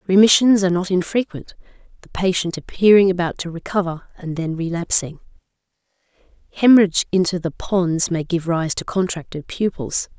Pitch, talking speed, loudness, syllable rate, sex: 180 Hz, 135 wpm, -18 LUFS, 5.3 syllables/s, female